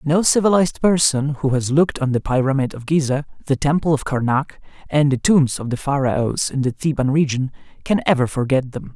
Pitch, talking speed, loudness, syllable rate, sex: 140 Hz, 195 wpm, -19 LUFS, 5.5 syllables/s, male